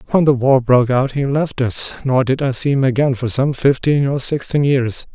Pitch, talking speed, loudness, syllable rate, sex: 130 Hz, 235 wpm, -16 LUFS, 5.1 syllables/s, male